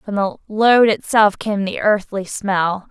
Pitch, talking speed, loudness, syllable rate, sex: 205 Hz, 165 wpm, -17 LUFS, 3.7 syllables/s, female